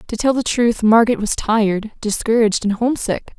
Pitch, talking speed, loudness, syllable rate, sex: 225 Hz, 175 wpm, -17 LUFS, 5.7 syllables/s, female